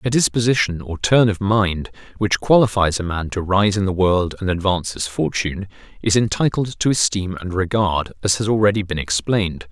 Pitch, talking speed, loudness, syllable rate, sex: 100 Hz, 185 wpm, -19 LUFS, 5.3 syllables/s, male